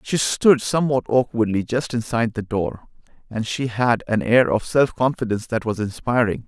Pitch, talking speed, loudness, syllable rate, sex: 120 Hz, 175 wpm, -20 LUFS, 5.1 syllables/s, male